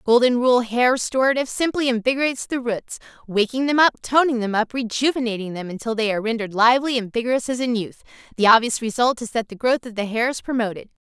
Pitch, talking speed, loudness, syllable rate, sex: 240 Hz, 190 wpm, -20 LUFS, 6.5 syllables/s, female